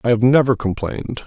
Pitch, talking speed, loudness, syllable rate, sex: 120 Hz, 190 wpm, -18 LUFS, 6.0 syllables/s, male